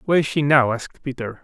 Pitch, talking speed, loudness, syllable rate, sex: 135 Hz, 250 wpm, -20 LUFS, 6.5 syllables/s, male